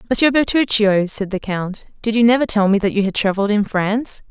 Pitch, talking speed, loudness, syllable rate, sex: 210 Hz, 225 wpm, -17 LUFS, 5.9 syllables/s, female